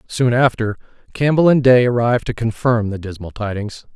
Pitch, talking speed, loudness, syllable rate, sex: 120 Hz, 165 wpm, -17 LUFS, 5.3 syllables/s, male